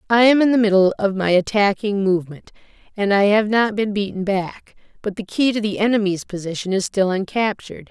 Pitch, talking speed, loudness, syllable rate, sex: 200 Hz, 195 wpm, -19 LUFS, 5.6 syllables/s, female